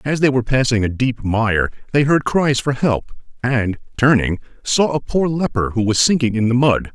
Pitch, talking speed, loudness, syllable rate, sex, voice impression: 125 Hz, 205 wpm, -17 LUFS, 4.9 syllables/s, male, masculine, middle-aged, tensed, powerful, clear, slightly raspy, cool, mature, wild, lively, slightly strict, intense